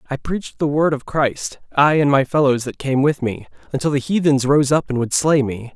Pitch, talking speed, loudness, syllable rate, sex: 140 Hz, 240 wpm, -18 LUFS, 5.2 syllables/s, male